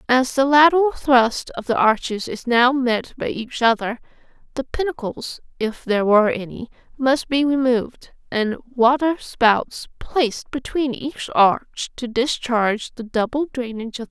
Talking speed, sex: 155 wpm, female